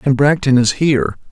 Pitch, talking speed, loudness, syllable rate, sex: 135 Hz, 185 wpm, -14 LUFS, 5.5 syllables/s, male